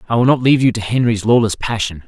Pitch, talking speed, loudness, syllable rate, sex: 115 Hz, 260 wpm, -15 LUFS, 6.9 syllables/s, male